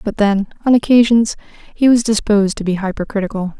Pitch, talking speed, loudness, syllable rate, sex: 210 Hz, 185 wpm, -15 LUFS, 6.1 syllables/s, female